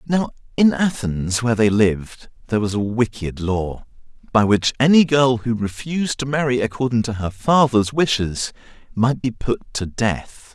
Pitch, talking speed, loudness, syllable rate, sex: 120 Hz, 165 wpm, -19 LUFS, 4.6 syllables/s, male